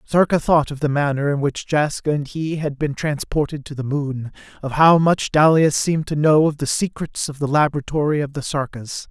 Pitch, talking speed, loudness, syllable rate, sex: 145 Hz, 210 wpm, -19 LUFS, 5.2 syllables/s, male